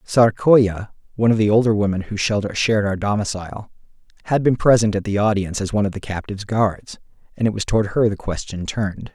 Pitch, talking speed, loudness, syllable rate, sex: 105 Hz, 195 wpm, -19 LUFS, 6.2 syllables/s, male